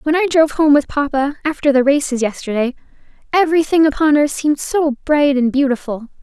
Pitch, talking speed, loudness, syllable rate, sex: 285 Hz, 175 wpm, -15 LUFS, 5.9 syllables/s, female